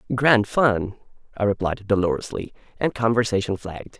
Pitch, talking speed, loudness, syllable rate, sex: 105 Hz, 120 wpm, -22 LUFS, 5.3 syllables/s, male